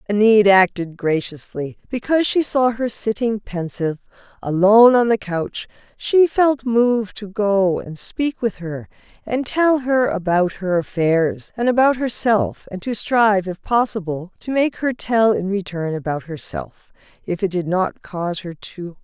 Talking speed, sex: 165 wpm, female